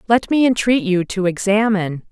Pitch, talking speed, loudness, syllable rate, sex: 205 Hz, 170 wpm, -17 LUFS, 5.3 syllables/s, female